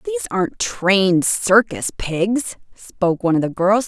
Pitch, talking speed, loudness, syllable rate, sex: 195 Hz, 155 wpm, -18 LUFS, 4.8 syllables/s, female